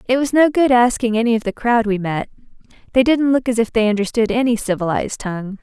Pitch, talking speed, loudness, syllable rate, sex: 230 Hz, 225 wpm, -17 LUFS, 6.3 syllables/s, female